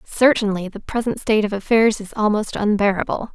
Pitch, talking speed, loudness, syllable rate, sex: 210 Hz, 160 wpm, -19 LUFS, 5.6 syllables/s, female